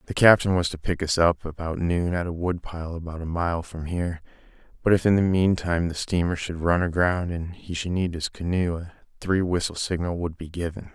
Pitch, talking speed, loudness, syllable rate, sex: 85 Hz, 225 wpm, -25 LUFS, 5.3 syllables/s, male